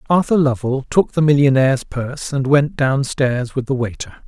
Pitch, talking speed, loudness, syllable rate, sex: 135 Hz, 185 wpm, -17 LUFS, 5.0 syllables/s, male